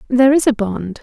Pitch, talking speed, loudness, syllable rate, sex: 240 Hz, 235 wpm, -15 LUFS, 5.9 syllables/s, female